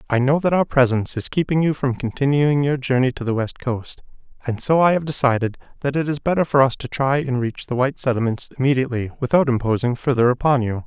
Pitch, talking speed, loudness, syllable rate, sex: 130 Hz, 220 wpm, -20 LUFS, 6.2 syllables/s, male